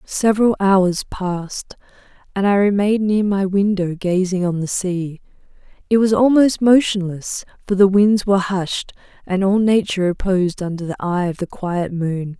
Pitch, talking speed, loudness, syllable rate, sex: 190 Hz, 160 wpm, -18 LUFS, 4.7 syllables/s, female